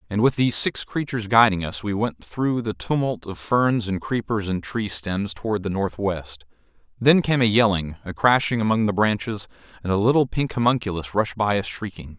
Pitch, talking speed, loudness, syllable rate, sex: 105 Hz, 195 wpm, -22 LUFS, 5.1 syllables/s, male